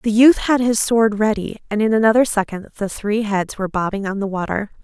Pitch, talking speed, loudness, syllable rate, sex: 210 Hz, 225 wpm, -18 LUFS, 5.5 syllables/s, female